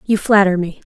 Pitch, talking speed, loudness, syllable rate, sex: 195 Hz, 195 wpm, -15 LUFS, 5.3 syllables/s, female